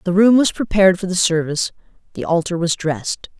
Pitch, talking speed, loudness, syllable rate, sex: 180 Hz, 195 wpm, -17 LUFS, 6.1 syllables/s, female